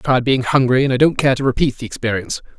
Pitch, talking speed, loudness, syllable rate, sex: 130 Hz, 280 wpm, -17 LUFS, 8.0 syllables/s, male